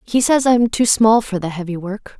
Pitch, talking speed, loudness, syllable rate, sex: 215 Hz, 245 wpm, -16 LUFS, 4.9 syllables/s, female